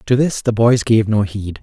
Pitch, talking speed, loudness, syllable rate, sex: 110 Hz, 260 wpm, -16 LUFS, 4.7 syllables/s, male